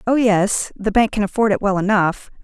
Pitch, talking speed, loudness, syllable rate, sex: 205 Hz, 220 wpm, -18 LUFS, 5.2 syllables/s, female